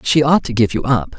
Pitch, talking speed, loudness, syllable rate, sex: 125 Hz, 305 wpm, -16 LUFS, 5.5 syllables/s, male